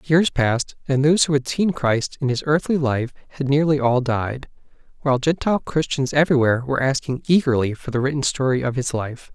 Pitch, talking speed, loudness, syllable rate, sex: 135 Hz, 195 wpm, -20 LUFS, 5.8 syllables/s, male